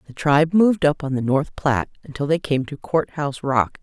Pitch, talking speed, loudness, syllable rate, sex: 145 Hz, 235 wpm, -20 LUFS, 5.7 syllables/s, female